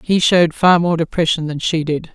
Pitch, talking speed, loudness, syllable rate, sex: 165 Hz, 225 wpm, -16 LUFS, 5.4 syllables/s, female